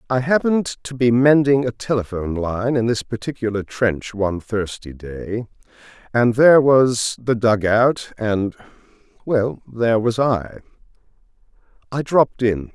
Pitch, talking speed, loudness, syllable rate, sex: 115 Hz, 130 wpm, -19 LUFS, 4.5 syllables/s, male